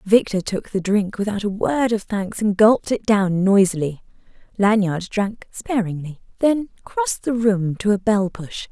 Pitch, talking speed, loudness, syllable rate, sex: 205 Hz, 170 wpm, -20 LUFS, 4.5 syllables/s, female